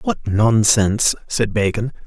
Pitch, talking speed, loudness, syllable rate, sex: 110 Hz, 115 wpm, -17 LUFS, 3.9 syllables/s, male